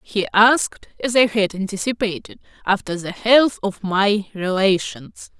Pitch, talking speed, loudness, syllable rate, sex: 205 Hz, 135 wpm, -19 LUFS, 4.3 syllables/s, female